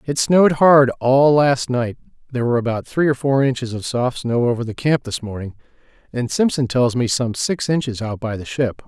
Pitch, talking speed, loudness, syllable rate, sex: 130 Hz, 215 wpm, -18 LUFS, 5.2 syllables/s, male